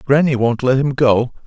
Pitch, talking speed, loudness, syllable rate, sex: 130 Hz, 205 wpm, -16 LUFS, 4.9 syllables/s, male